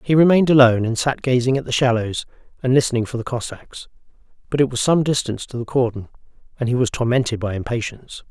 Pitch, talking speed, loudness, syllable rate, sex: 125 Hz, 200 wpm, -19 LUFS, 6.7 syllables/s, male